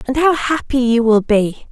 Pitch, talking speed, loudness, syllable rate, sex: 250 Hz, 210 wpm, -15 LUFS, 4.5 syllables/s, female